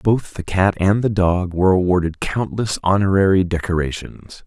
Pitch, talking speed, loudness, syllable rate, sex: 95 Hz, 150 wpm, -18 LUFS, 4.8 syllables/s, male